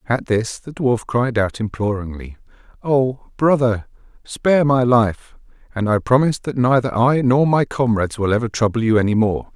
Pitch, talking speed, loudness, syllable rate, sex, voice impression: 120 Hz, 170 wpm, -18 LUFS, 4.9 syllables/s, male, masculine, middle-aged, tensed, powerful, slightly soft, clear, raspy, cool, intellectual, friendly, reassuring, wild, lively, kind